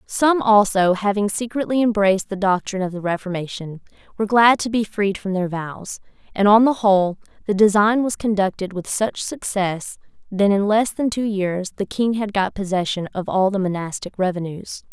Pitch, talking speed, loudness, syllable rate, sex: 200 Hz, 180 wpm, -20 LUFS, 5.1 syllables/s, female